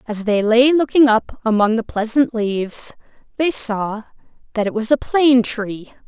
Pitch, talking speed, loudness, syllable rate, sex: 230 Hz, 170 wpm, -17 LUFS, 4.6 syllables/s, female